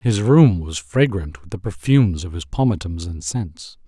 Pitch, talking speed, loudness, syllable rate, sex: 95 Hz, 185 wpm, -19 LUFS, 4.5 syllables/s, male